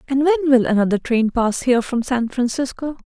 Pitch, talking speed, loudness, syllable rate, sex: 255 Hz, 195 wpm, -18 LUFS, 5.6 syllables/s, female